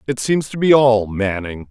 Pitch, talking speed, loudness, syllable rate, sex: 120 Hz, 210 wpm, -16 LUFS, 4.5 syllables/s, male